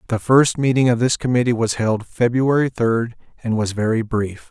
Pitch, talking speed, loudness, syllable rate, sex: 120 Hz, 185 wpm, -18 LUFS, 4.9 syllables/s, male